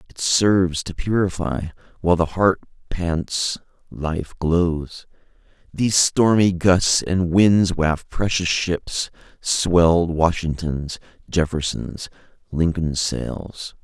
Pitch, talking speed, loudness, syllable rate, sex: 85 Hz, 95 wpm, -20 LUFS, 3.2 syllables/s, male